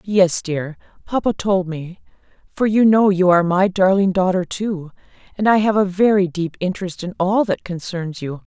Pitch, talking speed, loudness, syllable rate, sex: 185 Hz, 185 wpm, -18 LUFS, 4.8 syllables/s, female